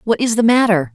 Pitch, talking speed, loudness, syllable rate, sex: 225 Hz, 255 wpm, -14 LUFS, 5.9 syllables/s, female